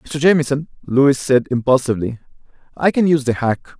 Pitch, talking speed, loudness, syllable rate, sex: 135 Hz, 160 wpm, -17 LUFS, 6.2 syllables/s, male